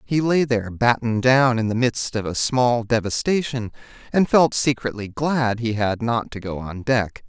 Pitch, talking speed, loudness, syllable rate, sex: 120 Hz, 190 wpm, -21 LUFS, 4.6 syllables/s, male